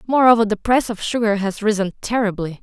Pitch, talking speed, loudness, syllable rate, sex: 215 Hz, 185 wpm, -18 LUFS, 6.2 syllables/s, female